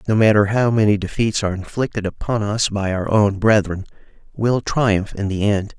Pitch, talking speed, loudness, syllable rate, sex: 105 Hz, 185 wpm, -19 LUFS, 5.1 syllables/s, male